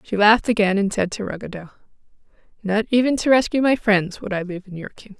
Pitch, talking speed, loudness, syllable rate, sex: 210 Hz, 220 wpm, -20 LUFS, 6.3 syllables/s, female